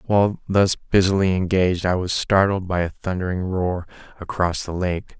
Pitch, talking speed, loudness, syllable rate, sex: 90 Hz, 160 wpm, -21 LUFS, 4.8 syllables/s, male